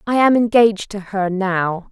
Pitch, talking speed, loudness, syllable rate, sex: 205 Hz, 190 wpm, -16 LUFS, 4.5 syllables/s, female